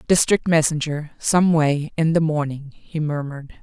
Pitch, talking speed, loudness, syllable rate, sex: 155 Hz, 115 wpm, -20 LUFS, 4.6 syllables/s, female